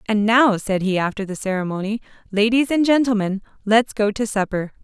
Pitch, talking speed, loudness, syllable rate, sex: 215 Hz, 175 wpm, -20 LUFS, 5.4 syllables/s, female